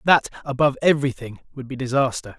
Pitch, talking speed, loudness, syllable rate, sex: 135 Hz, 150 wpm, -21 LUFS, 6.9 syllables/s, male